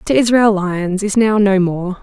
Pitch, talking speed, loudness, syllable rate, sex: 200 Hz, 210 wpm, -14 LUFS, 4.0 syllables/s, female